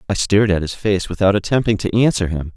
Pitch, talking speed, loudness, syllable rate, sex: 100 Hz, 235 wpm, -17 LUFS, 6.3 syllables/s, male